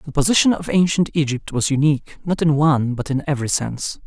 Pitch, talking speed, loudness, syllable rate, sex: 150 Hz, 205 wpm, -19 LUFS, 6.2 syllables/s, male